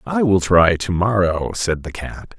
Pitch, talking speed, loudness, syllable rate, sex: 100 Hz, 200 wpm, -17 LUFS, 4.1 syllables/s, male